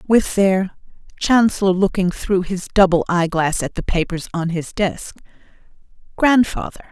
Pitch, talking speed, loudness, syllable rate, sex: 185 Hz, 120 wpm, -18 LUFS, 4.5 syllables/s, female